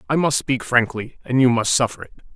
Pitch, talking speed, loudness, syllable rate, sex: 125 Hz, 230 wpm, -19 LUFS, 5.7 syllables/s, male